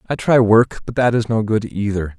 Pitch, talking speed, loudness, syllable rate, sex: 110 Hz, 250 wpm, -17 LUFS, 5.2 syllables/s, male